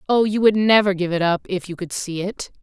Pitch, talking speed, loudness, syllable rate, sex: 190 Hz, 275 wpm, -20 LUFS, 5.6 syllables/s, female